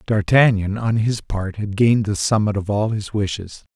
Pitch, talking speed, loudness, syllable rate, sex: 105 Hz, 190 wpm, -19 LUFS, 4.8 syllables/s, male